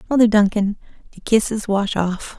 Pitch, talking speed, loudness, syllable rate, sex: 210 Hz, 150 wpm, -18 LUFS, 4.9 syllables/s, female